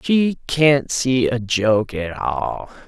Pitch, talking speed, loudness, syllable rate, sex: 130 Hz, 145 wpm, -19 LUFS, 2.8 syllables/s, male